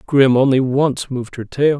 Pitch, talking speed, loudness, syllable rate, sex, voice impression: 135 Hz, 200 wpm, -16 LUFS, 4.7 syllables/s, male, very masculine, very middle-aged, very thick, tensed, slightly weak, dark, soft, slightly muffled, fluent, raspy, slightly cool, intellectual, slightly refreshing, very sincere, calm, mature, friendly, reassuring, unique, slightly elegant, wild, slightly sweet, slightly lively, kind, modest